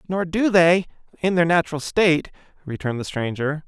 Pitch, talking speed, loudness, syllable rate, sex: 165 Hz, 165 wpm, -21 LUFS, 5.7 syllables/s, male